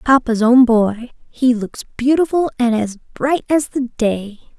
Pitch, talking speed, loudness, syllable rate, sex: 245 Hz, 155 wpm, -16 LUFS, 4.0 syllables/s, female